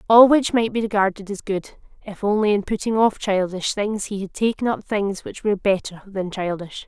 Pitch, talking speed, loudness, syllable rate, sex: 205 Hz, 210 wpm, -21 LUFS, 5.1 syllables/s, female